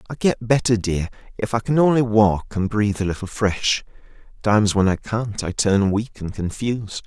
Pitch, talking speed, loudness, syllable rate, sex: 105 Hz, 195 wpm, -21 LUFS, 5.0 syllables/s, male